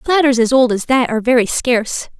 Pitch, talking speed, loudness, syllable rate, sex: 245 Hz, 220 wpm, -14 LUFS, 5.9 syllables/s, female